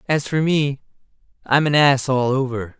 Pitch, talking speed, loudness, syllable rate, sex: 135 Hz, 170 wpm, -18 LUFS, 4.4 syllables/s, male